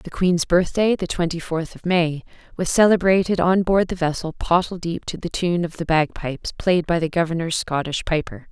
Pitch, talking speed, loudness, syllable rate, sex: 170 Hz, 195 wpm, -21 LUFS, 5.1 syllables/s, female